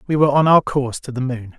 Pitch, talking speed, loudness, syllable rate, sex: 135 Hz, 305 wpm, -17 LUFS, 7.0 syllables/s, male